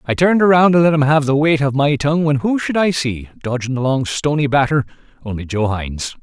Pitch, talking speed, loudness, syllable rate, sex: 140 Hz, 230 wpm, -16 LUFS, 6.0 syllables/s, male